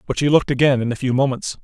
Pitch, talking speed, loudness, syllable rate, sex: 130 Hz, 295 wpm, -18 LUFS, 7.5 syllables/s, male